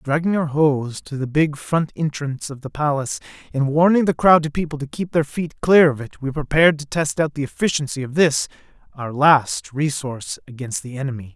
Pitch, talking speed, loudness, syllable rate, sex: 145 Hz, 200 wpm, -20 LUFS, 5.5 syllables/s, male